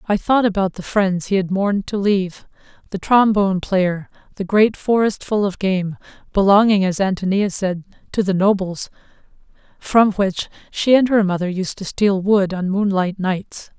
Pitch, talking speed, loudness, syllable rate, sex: 195 Hz, 160 wpm, -18 LUFS, 4.7 syllables/s, female